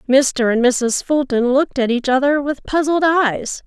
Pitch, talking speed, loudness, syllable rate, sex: 270 Hz, 180 wpm, -17 LUFS, 4.3 syllables/s, female